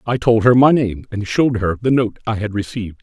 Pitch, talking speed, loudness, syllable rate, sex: 110 Hz, 260 wpm, -17 LUFS, 5.9 syllables/s, male